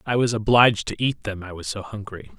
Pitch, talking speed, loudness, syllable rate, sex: 105 Hz, 250 wpm, -22 LUFS, 5.9 syllables/s, male